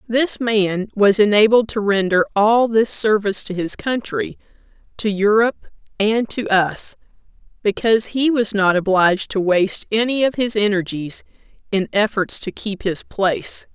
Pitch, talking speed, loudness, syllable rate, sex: 210 Hz, 150 wpm, -18 LUFS, 4.6 syllables/s, female